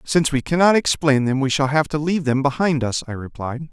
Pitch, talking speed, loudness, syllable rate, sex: 145 Hz, 240 wpm, -19 LUFS, 5.9 syllables/s, male